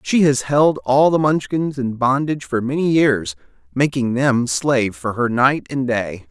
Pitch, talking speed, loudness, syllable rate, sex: 130 Hz, 180 wpm, -18 LUFS, 4.3 syllables/s, male